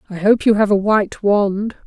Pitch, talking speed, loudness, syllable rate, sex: 205 Hz, 225 wpm, -16 LUFS, 5.1 syllables/s, female